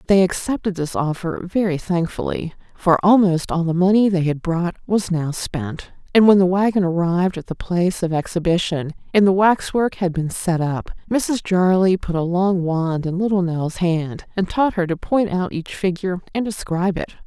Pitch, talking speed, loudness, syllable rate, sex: 180 Hz, 190 wpm, -19 LUFS, 4.3 syllables/s, female